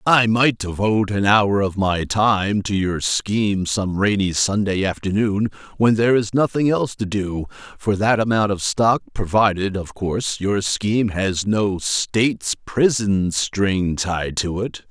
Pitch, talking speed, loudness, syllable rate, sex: 105 Hz, 160 wpm, -19 LUFS, 4.1 syllables/s, male